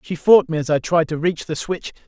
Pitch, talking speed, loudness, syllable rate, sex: 165 Hz, 290 wpm, -19 LUFS, 5.4 syllables/s, male